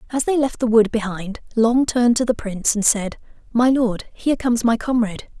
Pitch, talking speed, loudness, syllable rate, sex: 230 Hz, 210 wpm, -19 LUFS, 5.7 syllables/s, female